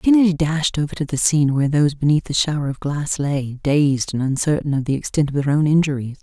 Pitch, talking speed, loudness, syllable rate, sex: 145 Hz, 230 wpm, -19 LUFS, 6.0 syllables/s, female